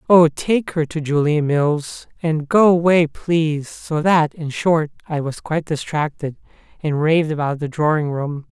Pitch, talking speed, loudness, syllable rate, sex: 155 Hz, 170 wpm, -19 LUFS, 4.4 syllables/s, male